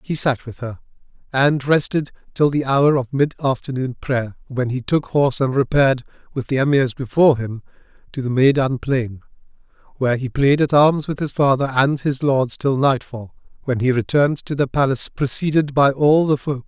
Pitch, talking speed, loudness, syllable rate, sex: 135 Hz, 190 wpm, -18 LUFS, 5.2 syllables/s, male